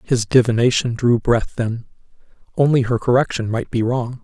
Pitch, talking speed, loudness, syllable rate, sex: 120 Hz, 155 wpm, -18 LUFS, 5.0 syllables/s, male